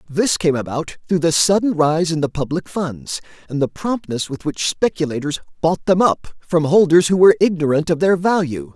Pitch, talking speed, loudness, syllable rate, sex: 165 Hz, 190 wpm, -18 LUFS, 5.0 syllables/s, male